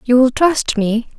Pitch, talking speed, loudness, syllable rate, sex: 250 Hz, 150 wpm, -15 LUFS, 2.9 syllables/s, female